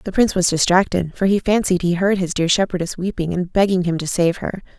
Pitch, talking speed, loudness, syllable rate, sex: 180 Hz, 240 wpm, -18 LUFS, 5.8 syllables/s, female